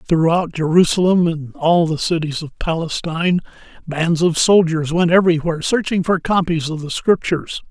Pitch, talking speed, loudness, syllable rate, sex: 165 Hz, 150 wpm, -17 LUFS, 5.2 syllables/s, male